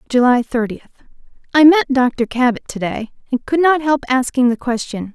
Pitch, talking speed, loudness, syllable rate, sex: 255 Hz, 165 wpm, -16 LUFS, 5.1 syllables/s, female